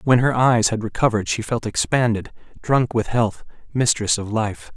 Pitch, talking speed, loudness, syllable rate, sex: 115 Hz, 175 wpm, -20 LUFS, 4.9 syllables/s, male